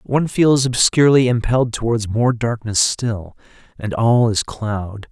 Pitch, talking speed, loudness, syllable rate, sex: 115 Hz, 140 wpm, -17 LUFS, 4.3 syllables/s, male